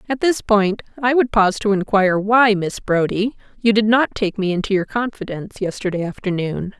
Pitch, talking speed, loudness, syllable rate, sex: 205 Hz, 185 wpm, -18 LUFS, 5.4 syllables/s, female